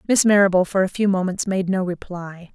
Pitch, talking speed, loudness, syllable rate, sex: 190 Hz, 215 wpm, -19 LUFS, 5.5 syllables/s, female